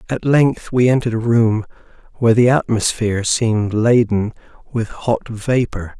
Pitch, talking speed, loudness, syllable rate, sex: 115 Hz, 140 wpm, -17 LUFS, 4.7 syllables/s, male